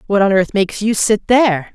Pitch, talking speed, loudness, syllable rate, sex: 205 Hz, 240 wpm, -14 LUFS, 5.7 syllables/s, female